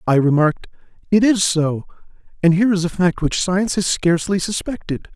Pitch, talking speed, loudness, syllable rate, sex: 180 Hz, 175 wpm, -18 LUFS, 5.8 syllables/s, male